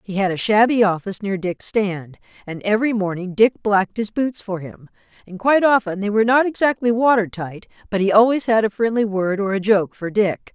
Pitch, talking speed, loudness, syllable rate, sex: 205 Hz, 215 wpm, -19 LUFS, 5.5 syllables/s, female